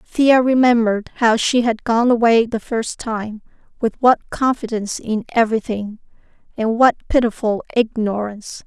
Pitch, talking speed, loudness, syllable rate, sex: 230 Hz, 130 wpm, -18 LUFS, 4.8 syllables/s, female